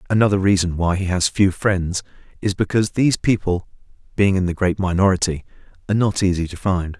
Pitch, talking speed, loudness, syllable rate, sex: 95 Hz, 180 wpm, -19 LUFS, 6.0 syllables/s, male